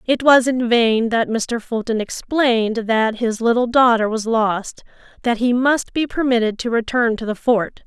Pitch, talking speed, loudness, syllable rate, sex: 235 Hz, 185 wpm, -18 LUFS, 4.4 syllables/s, female